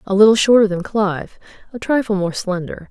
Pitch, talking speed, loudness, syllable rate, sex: 200 Hz, 185 wpm, -16 LUFS, 5.7 syllables/s, female